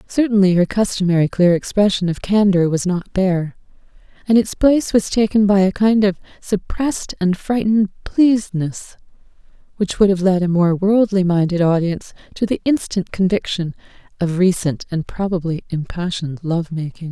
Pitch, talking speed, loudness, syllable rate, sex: 190 Hz, 145 wpm, -17 LUFS, 5.3 syllables/s, female